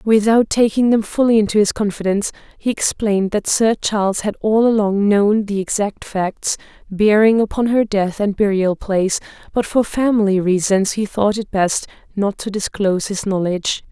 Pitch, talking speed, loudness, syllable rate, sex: 205 Hz, 170 wpm, -17 LUFS, 5.0 syllables/s, female